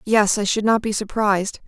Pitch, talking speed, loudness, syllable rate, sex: 210 Hz, 215 wpm, -20 LUFS, 5.3 syllables/s, female